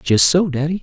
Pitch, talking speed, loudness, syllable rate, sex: 160 Hz, 220 wpm, -15 LUFS, 5.1 syllables/s, male